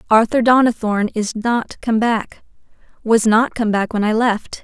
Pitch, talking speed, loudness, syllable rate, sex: 225 Hz, 155 wpm, -17 LUFS, 4.5 syllables/s, female